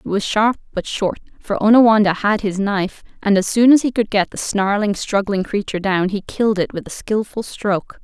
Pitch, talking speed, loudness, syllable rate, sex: 205 Hz, 215 wpm, -18 LUFS, 5.4 syllables/s, female